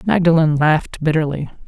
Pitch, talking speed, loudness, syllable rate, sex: 160 Hz, 105 wpm, -16 LUFS, 5.7 syllables/s, female